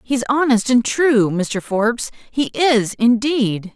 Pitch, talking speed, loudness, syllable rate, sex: 240 Hz, 130 wpm, -17 LUFS, 3.4 syllables/s, female